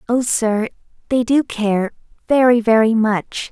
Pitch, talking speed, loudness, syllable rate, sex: 230 Hz, 135 wpm, -17 LUFS, 4.0 syllables/s, female